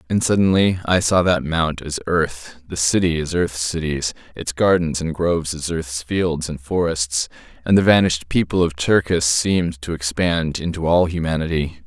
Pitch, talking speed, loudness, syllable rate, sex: 80 Hz, 155 wpm, -19 LUFS, 4.7 syllables/s, male